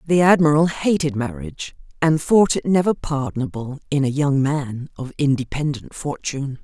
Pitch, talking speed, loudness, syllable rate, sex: 145 Hz, 145 wpm, -20 LUFS, 5.0 syllables/s, female